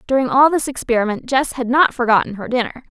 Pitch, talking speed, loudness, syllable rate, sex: 250 Hz, 200 wpm, -17 LUFS, 6.3 syllables/s, female